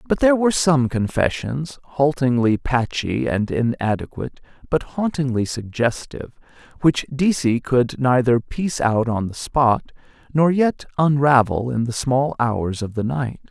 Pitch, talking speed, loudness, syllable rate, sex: 130 Hz, 140 wpm, -20 LUFS, 4.4 syllables/s, male